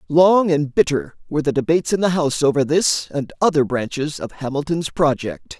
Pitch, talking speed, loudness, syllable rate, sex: 150 Hz, 180 wpm, -19 LUFS, 5.4 syllables/s, male